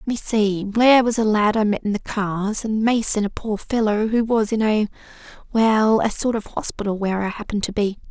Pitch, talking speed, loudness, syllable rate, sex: 215 Hz, 220 wpm, -20 LUFS, 5.3 syllables/s, female